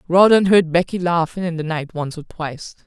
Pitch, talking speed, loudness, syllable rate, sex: 170 Hz, 210 wpm, -18 LUFS, 5.3 syllables/s, female